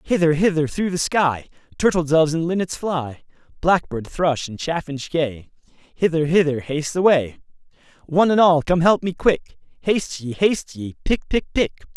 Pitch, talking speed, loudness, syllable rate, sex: 160 Hz, 160 wpm, -20 LUFS, 4.9 syllables/s, male